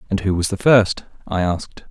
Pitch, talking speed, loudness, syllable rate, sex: 100 Hz, 220 wpm, -18 LUFS, 5.4 syllables/s, male